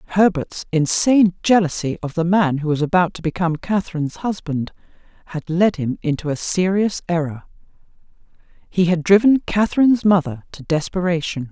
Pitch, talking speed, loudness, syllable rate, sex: 175 Hz, 140 wpm, -19 LUFS, 5.5 syllables/s, female